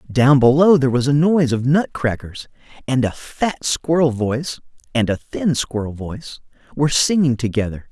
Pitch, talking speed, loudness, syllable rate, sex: 135 Hz, 160 wpm, -18 LUFS, 5.1 syllables/s, male